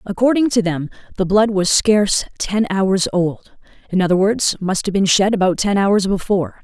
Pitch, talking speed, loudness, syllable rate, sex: 195 Hz, 190 wpm, -17 LUFS, 4.9 syllables/s, female